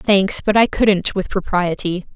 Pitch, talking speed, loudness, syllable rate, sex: 195 Hz, 165 wpm, -17 LUFS, 3.9 syllables/s, female